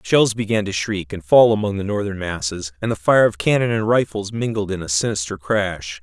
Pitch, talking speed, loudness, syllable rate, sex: 100 Hz, 220 wpm, -19 LUFS, 5.3 syllables/s, male